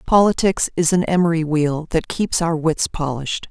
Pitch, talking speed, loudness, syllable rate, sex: 165 Hz, 170 wpm, -19 LUFS, 4.9 syllables/s, female